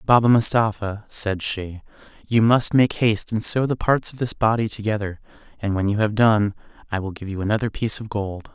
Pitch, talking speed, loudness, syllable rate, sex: 105 Hz, 205 wpm, -21 LUFS, 5.4 syllables/s, male